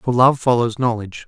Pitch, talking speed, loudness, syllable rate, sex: 120 Hz, 190 wpm, -18 LUFS, 5.7 syllables/s, male